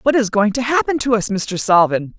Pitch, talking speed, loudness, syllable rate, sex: 215 Hz, 245 wpm, -17 LUFS, 5.3 syllables/s, female